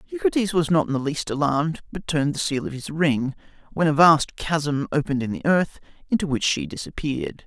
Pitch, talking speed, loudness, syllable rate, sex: 150 Hz, 210 wpm, -23 LUFS, 5.7 syllables/s, male